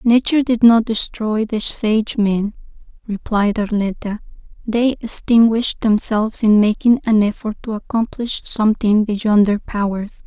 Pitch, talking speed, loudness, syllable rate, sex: 215 Hz, 125 wpm, -17 LUFS, 4.5 syllables/s, female